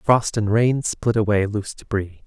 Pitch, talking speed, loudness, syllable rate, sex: 105 Hz, 185 wpm, -21 LUFS, 4.5 syllables/s, male